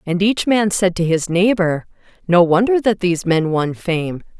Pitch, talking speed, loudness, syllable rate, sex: 185 Hz, 190 wpm, -17 LUFS, 4.6 syllables/s, female